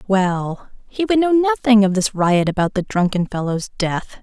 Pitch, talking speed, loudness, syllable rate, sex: 210 Hz, 185 wpm, -18 LUFS, 4.4 syllables/s, female